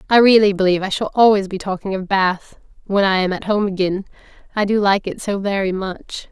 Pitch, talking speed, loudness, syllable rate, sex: 195 Hz, 210 wpm, -18 LUFS, 5.7 syllables/s, female